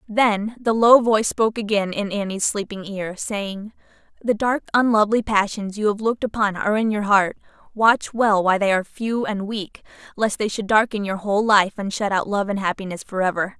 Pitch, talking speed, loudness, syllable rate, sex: 210 Hz, 205 wpm, -20 LUFS, 5.4 syllables/s, female